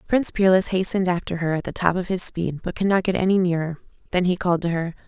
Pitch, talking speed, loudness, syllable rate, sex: 180 Hz, 260 wpm, -22 LUFS, 6.7 syllables/s, female